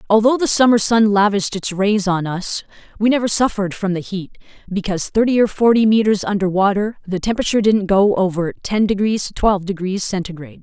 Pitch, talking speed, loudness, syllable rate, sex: 200 Hz, 180 wpm, -17 LUFS, 6.1 syllables/s, female